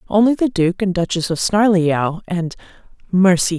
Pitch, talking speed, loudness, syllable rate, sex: 185 Hz, 135 wpm, -17 LUFS, 4.6 syllables/s, female